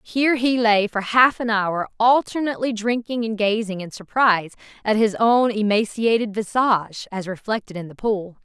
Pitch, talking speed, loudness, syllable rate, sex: 215 Hz, 165 wpm, -20 LUFS, 5.0 syllables/s, female